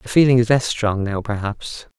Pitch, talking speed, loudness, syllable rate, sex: 115 Hz, 210 wpm, -19 LUFS, 4.8 syllables/s, male